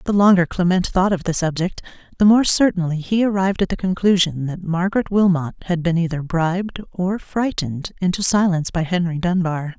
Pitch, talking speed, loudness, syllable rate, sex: 180 Hz, 180 wpm, -19 LUFS, 5.5 syllables/s, female